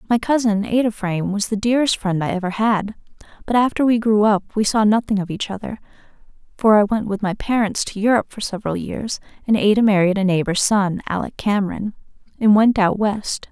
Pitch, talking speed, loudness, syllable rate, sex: 210 Hz, 200 wpm, -19 LUFS, 5.8 syllables/s, female